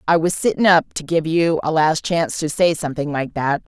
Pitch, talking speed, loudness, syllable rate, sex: 160 Hz, 240 wpm, -18 LUFS, 5.5 syllables/s, female